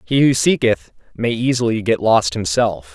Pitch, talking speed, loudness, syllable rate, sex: 115 Hz, 165 wpm, -17 LUFS, 4.6 syllables/s, male